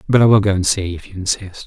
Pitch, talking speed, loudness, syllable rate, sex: 100 Hz, 325 wpm, -17 LUFS, 6.6 syllables/s, male